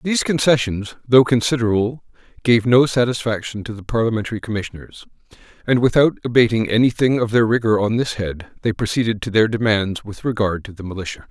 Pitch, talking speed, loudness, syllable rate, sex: 115 Hz, 170 wpm, -18 LUFS, 6.0 syllables/s, male